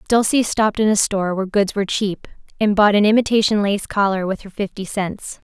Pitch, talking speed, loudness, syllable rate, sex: 205 Hz, 205 wpm, -18 LUFS, 5.8 syllables/s, female